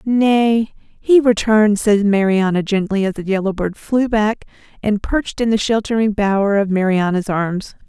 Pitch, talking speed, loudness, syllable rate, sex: 210 Hz, 160 wpm, -16 LUFS, 4.5 syllables/s, female